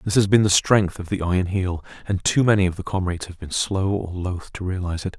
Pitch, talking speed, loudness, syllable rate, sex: 95 Hz, 265 wpm, -22 LUFS, 6.0 syllables/s, male